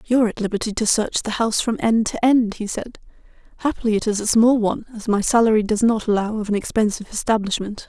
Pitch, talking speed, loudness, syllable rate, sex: 220 Hz, 220 wpm, -20 LUFS, 6.4 syllables/s, female